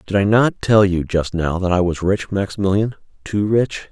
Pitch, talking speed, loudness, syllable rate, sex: 100 Hz, 200 wpm, -18 LUFS, 4.8 syllables/s, male